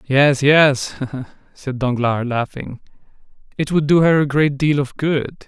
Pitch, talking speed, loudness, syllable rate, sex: 140 Hz, 155 wpm, -17 LUFS, 4.1 syllables/s, male